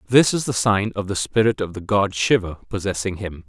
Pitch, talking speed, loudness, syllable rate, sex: 100 Hz, 225 wpm, -21 LUFS, 5.4 syllables/s, male